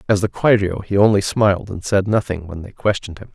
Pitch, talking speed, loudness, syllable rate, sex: 100 Hz, 235 wpm, -18 LUFS, 6.1 syllables/s, male